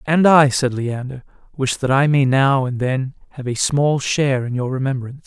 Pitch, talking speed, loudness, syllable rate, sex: 135 Hz, 205 wpm, -18 LUFS, 4.9 syllables/s, male